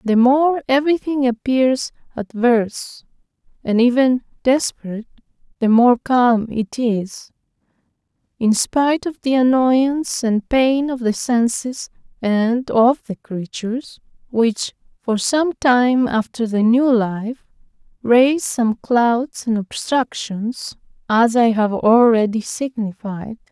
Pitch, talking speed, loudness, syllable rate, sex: 240 Hz, 115 wpm, -18 LUFS, 3.7 syllables/s, female